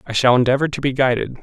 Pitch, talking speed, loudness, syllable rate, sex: 130 Hz, 255 wpm, -17 LUFS, 7.1 syllables/s, male